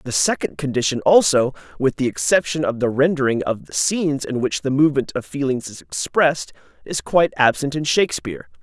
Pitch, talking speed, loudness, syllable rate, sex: 135 Hz, 180 wpm, -19 LUFS, 5.8 syllables/s, male